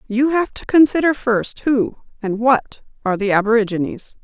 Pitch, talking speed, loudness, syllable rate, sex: 240 Hz, 155 wpm, -18 LUFS, 5.0 syllables/s, female